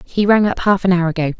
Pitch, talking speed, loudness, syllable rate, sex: 185 Hz, 300 wpm, -15 LUFS, 6.7 syllables/s, female